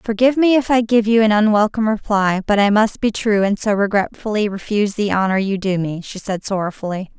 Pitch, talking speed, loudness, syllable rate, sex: 210 Hz, 215 wpm, -17 LUFS, 5.9 syllables/s, female